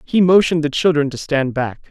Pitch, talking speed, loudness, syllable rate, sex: 155 Hz, 220 wpm, -16 LUFS, 5.7 syllables/s, male